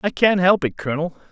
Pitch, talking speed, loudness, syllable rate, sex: 175 Hz, 230 wpm, -19 LUFS, 6.4 syllables/s, male